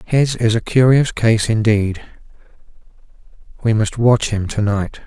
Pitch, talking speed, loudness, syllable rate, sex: 110 Hz, 140 wpm, -16 LUFS, 4.2 syllables/s, male